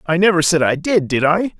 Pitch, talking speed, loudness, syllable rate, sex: 175 Hz, 265 wpm, -16 LUFS, 5.7 syllables/s, male